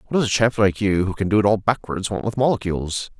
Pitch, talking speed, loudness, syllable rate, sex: 105 Hz, 280 wpm, -20 LUFS, 6.5 syllables/s, male